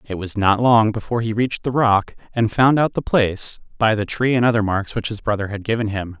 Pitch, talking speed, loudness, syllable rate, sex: 110 Hz, 250 wpm, -19 LUFS, 5.7 syllables/s, male